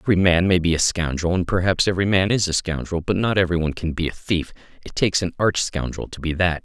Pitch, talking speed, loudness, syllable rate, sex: 90 Hz, 260 wpm, -21 LUFS, 6.6 syllables/s, male